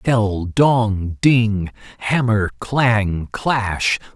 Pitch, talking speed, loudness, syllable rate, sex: 110 Hz, 85 wpm, -18 LUFS, 2.1 syllables/s, male